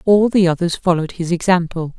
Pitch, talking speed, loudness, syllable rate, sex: 175 Hz, 180 wpm, -17 LUFS, 5.9 syllables/s, female